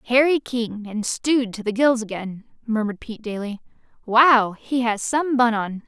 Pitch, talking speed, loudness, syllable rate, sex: 230 Hz, 175 wpm, -21 LUFS, 4.9 syllables/s, female